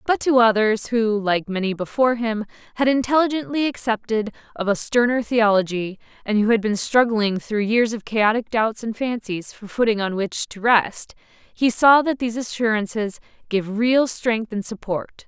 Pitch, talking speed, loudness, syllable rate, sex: 225 Hz, 170 wpm, -20 LUFS, 4.7 syllables/s, female